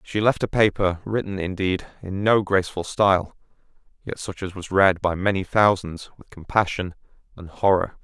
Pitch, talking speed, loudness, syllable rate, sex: 95 Hz, 165 wpm, -22 LUFS, 5.0 syllables/s, male